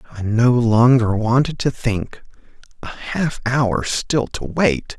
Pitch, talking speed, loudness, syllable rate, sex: 120 Hz, 145 wpm, -18 LUFS, 3.5 syllables/s, male